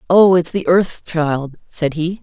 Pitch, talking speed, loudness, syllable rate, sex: 165 Hz, 190 wpm, -16 LUFS, 3.8 syllables/s, female